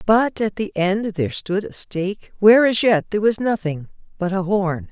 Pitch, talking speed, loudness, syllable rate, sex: 195 Hz, 205 wpm, -19 LUFS, 5.0 syllables/s, female